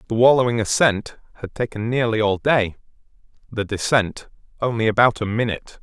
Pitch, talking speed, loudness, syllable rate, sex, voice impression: 110 Hz, 145 wpm, -20 LUFS, 5.5 syllables/s, male, very masculine, very adult-like, middle-aged, very thick, very tensed, powerful, bright, hard, clear, fluent, cool, intellectual, slightly refreshing, very sincere, very calm, very mature, friendly, reassuring, slightly unique, wild, slightly sweet, slightly lively, kind